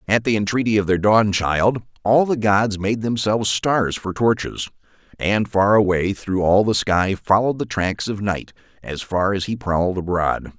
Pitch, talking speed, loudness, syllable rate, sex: 100 Hz, 180 wpm, -19 LUFS, 4.6 syllables/s, male